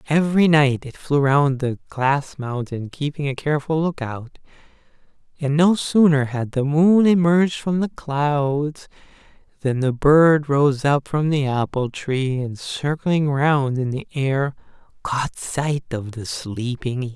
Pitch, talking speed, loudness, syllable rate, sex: 140 Hz, 155 wpm, -20 LUFS, 3.9 syllables/s, male